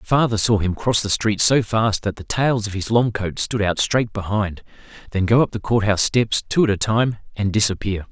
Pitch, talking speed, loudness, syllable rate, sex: 105 Hz, 235 wpm, -19 LUFS, 5.0 syllables/s, male